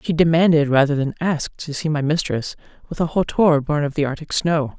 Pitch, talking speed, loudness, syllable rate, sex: 150 Hz, 215 wpm, -19 LUFS, 5.7 syllables/s, female